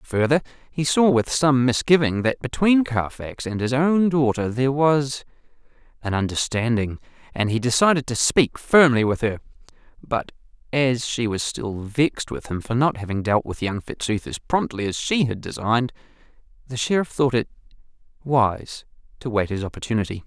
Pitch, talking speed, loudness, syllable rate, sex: 125 Hz, 165 wpm, -22 LUFS, 5.0 syllables/s, male